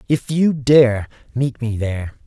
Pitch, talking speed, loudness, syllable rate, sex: 125 Hz, 160 wpm, -18 LUFS, 4.0 syllables/s, male